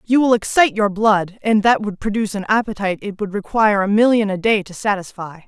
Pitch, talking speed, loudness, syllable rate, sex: 210 Hz, 220 wpm, -17 LUFS, 6.1 syllables/s, female